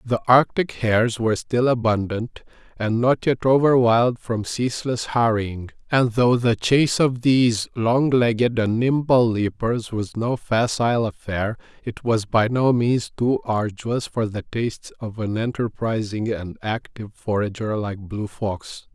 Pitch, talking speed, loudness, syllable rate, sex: 115 Hz, 150 wpm, -21 LUFS, 4.2 syllables/s, male